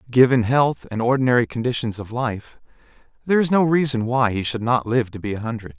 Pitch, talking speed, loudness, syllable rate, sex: 120 Hz, 205 wpm, -20 LUFS, 5.9 syllables/s, male